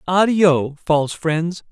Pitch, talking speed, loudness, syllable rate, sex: 165 Hz, 105 wpm, -18 LUFS, 3.5 syllables/s, male